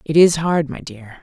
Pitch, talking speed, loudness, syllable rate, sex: 150 Hz, 245 wpm, -17 LUFS, 4.4 syllables/s, female